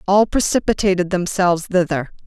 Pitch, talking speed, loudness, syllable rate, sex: 185 Hz, 105 wpm, -18 LUFS, 5.6 syllables/s, female